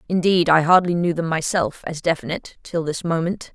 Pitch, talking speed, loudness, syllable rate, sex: 170 Hz, 185 wpm, -20 LUFS, 5.5 syllables/s, female